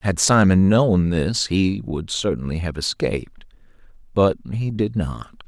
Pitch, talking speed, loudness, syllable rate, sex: 95 Hz, 140 wpm, -20 LUFS, 4.0 syllables/s, male